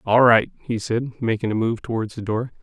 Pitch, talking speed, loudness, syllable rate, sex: 115 Hz, 230 wpm, -21 LUFS, 5.6 syllables/s, male